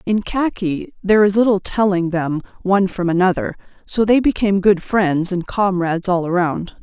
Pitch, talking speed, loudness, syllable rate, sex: 190 Hz, 165 wpm, -17 LUFS, 5.1 syllables/s, female